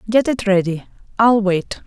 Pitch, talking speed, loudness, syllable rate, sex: 205 Hz, 160 wpm, -17 LUFS, 4.6 syllables/s, female